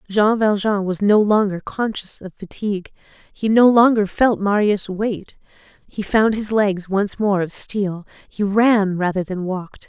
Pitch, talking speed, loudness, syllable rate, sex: 205 Hz, 165 wpm, -18 LUFS, 4.2 syllables/s, female